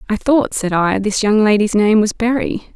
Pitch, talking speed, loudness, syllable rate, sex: 215 Hz, 220 wpm, -15 LUFS, 4.8 syllables/s, female